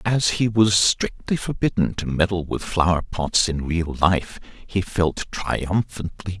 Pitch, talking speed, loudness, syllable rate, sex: 90 Hz, 160 wpm, -22 LUFS, 4.1 syllables/s, male